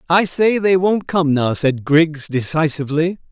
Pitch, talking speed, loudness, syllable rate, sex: 160 Hz, 165 wpm, -17 LUFS, 4.3 syllables/s, male